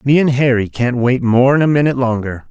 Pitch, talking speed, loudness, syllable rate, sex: 125 Hz, 215 wpm, -14 LUFS, 5.9 syllables/s, male